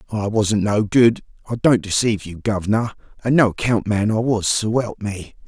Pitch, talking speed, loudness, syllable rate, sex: 105 Hz, 165 wpm, -19 LUFS, 4.5 syllables/s, male